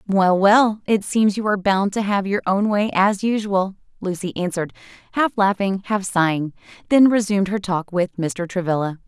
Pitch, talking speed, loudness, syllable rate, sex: 195 Hz, 180 wpm, -20 LUFS, 5.0 syllables/s, female